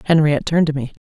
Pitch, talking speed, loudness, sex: 150 Hz, 235 wpm, -17 LUFS, female